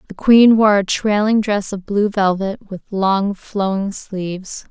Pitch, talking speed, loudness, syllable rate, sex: 200 Hz, 165 wpm, -17 LUFS, 3.9 syllables/s, female